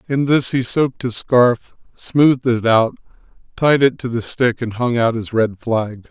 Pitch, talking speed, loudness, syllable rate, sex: 120 Hz, 195 wpm, -17 LUFS, 4.3 syllables/s, male